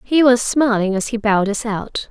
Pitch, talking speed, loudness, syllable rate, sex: 225 Hz, 230 wpm, -17 LUFS, 5.0 syllables/s, female